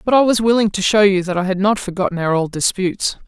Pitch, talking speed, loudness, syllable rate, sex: 195 Hz, 275 wpm, -17 LUFS, 6.1 syllables/s, female